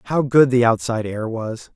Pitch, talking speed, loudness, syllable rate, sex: 120 Hz, 205 wpm, -18 LUFS, 5.2 syllables/s, male